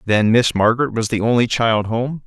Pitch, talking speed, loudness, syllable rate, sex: 115 Hz, 210 wpm, -17 LUFS, 5.2 syllables/s, male